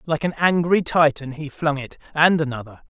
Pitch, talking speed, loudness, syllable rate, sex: 150 Hz, 180 wpm, -20 LUFS, 5.2 syllables/s, male